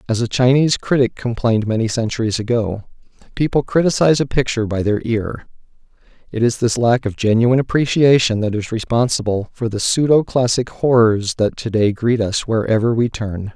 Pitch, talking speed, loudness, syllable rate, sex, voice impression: 115 Hz, 170 wpm, -17 LUFS, 5.5 syllables/s, male, very masculine, very adult-like, thick, tensed, slightly powerful, slightly dark, soft, slightly muffled, fluent, slightly raspy, cool, intellectual, slightly refreshing, sincere, very calm, slightly mature, friendly, reassuring, slightly unique, slightly elegant, slightly wild, sweet, slightly lively, slightly kind, modest